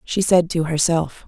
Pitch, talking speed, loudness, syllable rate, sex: 170 Hz, 190 wpm, -19 LUFS, 4.3 syllables/s, female